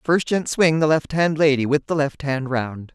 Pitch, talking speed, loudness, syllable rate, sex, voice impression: 145 Hz, 245 wpm, -20 LUFS, 4.6 syllables/s, female, feminine, adult-like, tensed, slightly powerful, hard, slightly raspy, intellectual, calm, reassuring, elegant, lively, sharp